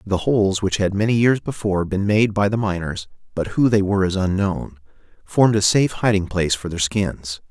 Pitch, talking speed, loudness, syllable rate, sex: 100 Hz, 190 wpm, -19 LUFS, 5.6 syllables/s, male